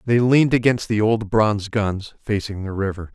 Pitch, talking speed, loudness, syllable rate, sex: 110 Hz, 190 wpm, -20 LUFS, 5.0 syllables/s, male